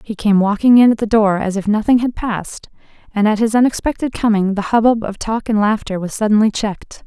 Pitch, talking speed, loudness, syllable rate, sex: 215 Hz, 220 wpm, -16 LUFS, 5.8 syllables/s, female